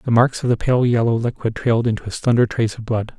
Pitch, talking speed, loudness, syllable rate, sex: 115 Hz, 265 wpm, -19 LUFS, 6.5 syllables/s, male